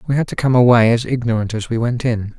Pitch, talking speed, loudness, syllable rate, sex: 120 Hz, 275 wpm, -16 LUFS, 6.3 syllables/s, male